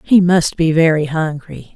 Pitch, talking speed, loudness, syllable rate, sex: 160 Hz, 170 wpm, -14 LUFS, 4.2 syllables/s, female